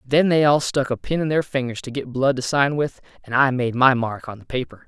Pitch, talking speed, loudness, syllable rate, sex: 135 Hz, 285 wpm, -21 LUFS, 5.5 syllables/s, male